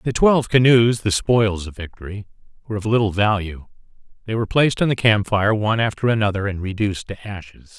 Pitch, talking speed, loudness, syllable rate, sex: 105 Hz, 195 wpm, -19 LUFS, 6.1 syllables/s, male